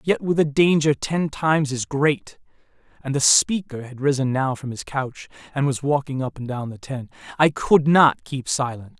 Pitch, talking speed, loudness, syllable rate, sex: 140 Hz, 200 wpm, -21 LUFS, 4.8 syllables/s, male